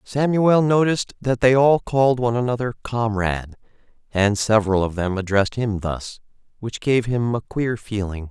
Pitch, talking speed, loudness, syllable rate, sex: 115 Hz, 160 wpm, -20 LUFS, 5.1 syllables/s, male